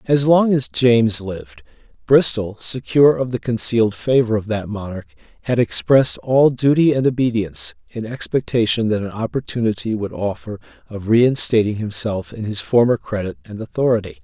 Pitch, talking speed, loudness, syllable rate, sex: 115 Hz, 150 wpm, -18 LUFS, 5.3 syllables/s, male